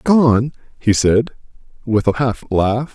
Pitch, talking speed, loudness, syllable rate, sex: 120 Hz, 145 wpm, -17 LUFS, 3.6 syllables/s, male